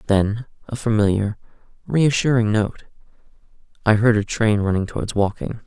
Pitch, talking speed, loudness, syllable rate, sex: 110 Hz, 105 wpm, -20 LUFS, 5.0 syllables/s, male